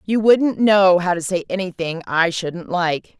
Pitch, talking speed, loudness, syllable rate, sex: 185 Hz, 190 wpm, -18 LUFS, 4.0 syllables/s, female